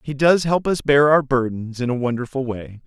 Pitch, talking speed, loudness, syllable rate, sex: 135 Hz, 230 wpm, -19 LUFS, 5.1 syllables/s, male